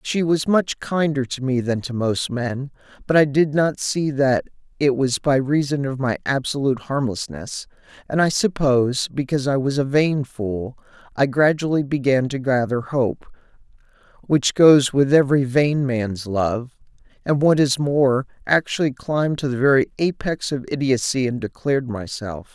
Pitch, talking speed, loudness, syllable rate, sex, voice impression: 135 Hz, 155 wpm, -20 LUFS, 4.6 syllables/s, male, very masculine, very adult-like, very thick, tensed, very powerful, bright, slightly soft, clear, fluent, very cool, intellectual, refreshing, very sincere, very calm, mature, friendly, reassuring, slightly unique, slightly elegant, wild, slightly sweet, slightly lively, kind